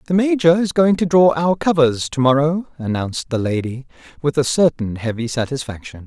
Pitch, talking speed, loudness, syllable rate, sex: 145 Hz, 180 wpm, -18 LUFS, 5.4 syllables/s, male